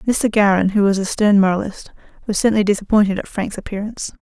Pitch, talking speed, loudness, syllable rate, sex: 205 Hz, 185 wpm, -17 LUFS, 6.4 syllables/s, female